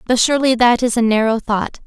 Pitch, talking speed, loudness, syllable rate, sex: 235 Hz, 225 wpm, -15 LUFS, 5.9 syllables/s, female